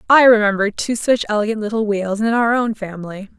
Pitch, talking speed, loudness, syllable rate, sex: 215 Hz, 195 wpm, -17 LUFS, 5.8 syllables/s, female